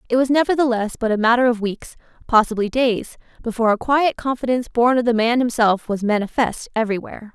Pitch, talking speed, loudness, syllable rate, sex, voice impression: 235 Hz, 180 wpm, -19 LUFS, 6.2 syllables/s, female, feminine, adult-like, slightly fluent, slightly intellectual, slightly refreshing